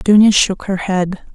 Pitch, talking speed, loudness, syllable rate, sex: 195 Hz, 180 wpm, -14 LUFS, 4.1 syllables/s, female